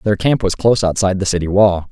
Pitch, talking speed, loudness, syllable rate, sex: 100 Hz, 250 wpm, -15 LUFS, 6.8 syllables/s, male